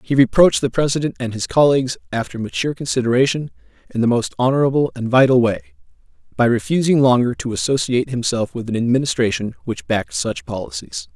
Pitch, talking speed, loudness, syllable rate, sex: 125 Hz, 155 wpm, -18 LUFS, 6.5 syllables/s, male